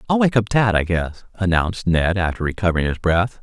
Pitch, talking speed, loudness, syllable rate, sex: 95 Hz, 210 wpm, -19 LUFS, 5.7 syllables/s, male